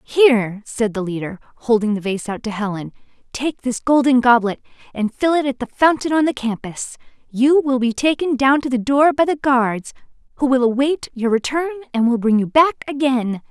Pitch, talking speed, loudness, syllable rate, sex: 250 Hz, 200 wpm, -18 LUFS, 5.0 syllables/s, female